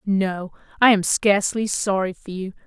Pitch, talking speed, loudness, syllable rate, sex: 195 Hz, 160 wpm, -20 LUFS, 4.6 syllables/s, female